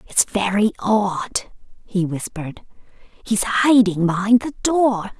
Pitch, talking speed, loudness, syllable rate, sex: 210 Hz, 115 wpm, -19 LUFS, 3.6 syllables/s, female